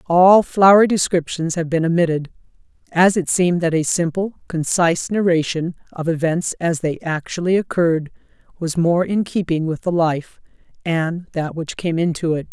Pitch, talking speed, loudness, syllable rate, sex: 170 Hz, 160 wpm, -18 LUFS, 4.9 syllables/s, female